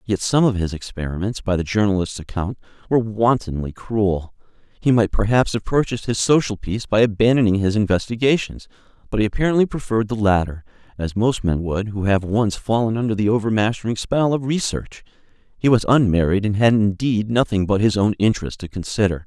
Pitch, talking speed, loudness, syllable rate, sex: 105 Hz, 175 wpm, -20 LUFS, 5.8 syllables/s, male